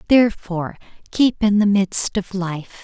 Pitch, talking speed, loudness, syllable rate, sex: 200 Hz, 150 wpm, -19 LUFS, 4.6 syllables/s, female